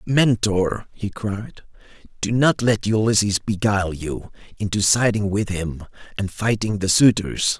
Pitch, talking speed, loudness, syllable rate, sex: 105 Hz, 135 wpm, -20 LUFS, 4.2 syllables/s, male